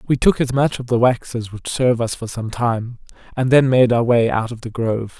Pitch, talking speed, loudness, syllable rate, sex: 120 Hz, 265 wpm, -18 LUFS, 5.4 syllables/s, male